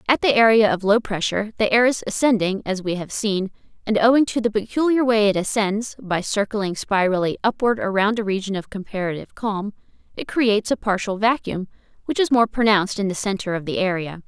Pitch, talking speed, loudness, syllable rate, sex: 210 Hz, 190 wpm, -20 LUFS, 5.7 syllables/s, female